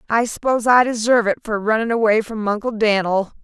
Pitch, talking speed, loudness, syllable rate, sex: 220 Hz, 190 wpm, -18 LUFS, 5.4 syllables/s, female